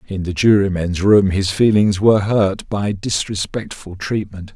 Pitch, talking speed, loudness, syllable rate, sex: 100 Hz, 145 wpm, -17 LUFS, 4.3 syllables/s, male